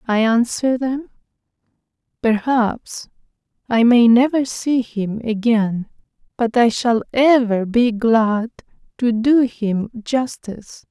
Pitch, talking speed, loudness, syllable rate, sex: 235 Hz, 110 wpm, -17 LUFS, 3.5 syllables/s, female